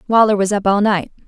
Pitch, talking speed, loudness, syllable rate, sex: 205 Hz, 235 wpm, -15 LUFS, 6.1 syllables/s, female